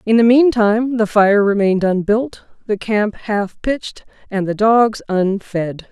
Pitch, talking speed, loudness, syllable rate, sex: 210 Hz, 150 wpm, -16 LUFS, 4.2 syllables/s, female